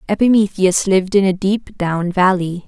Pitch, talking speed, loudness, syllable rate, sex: 190 Hz, 155 wpm, -16 LUFS, 4.8 syllables/s, female